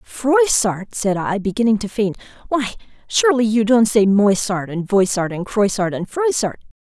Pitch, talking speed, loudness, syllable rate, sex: 215 Hz, 160 wpm, -18 LUFS, 4.6 syllables/s, female